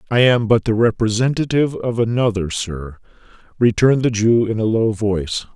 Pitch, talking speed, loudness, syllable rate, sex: 110 Hz, 160 wpm, -17 LUFS, 5.3 syllables/s, male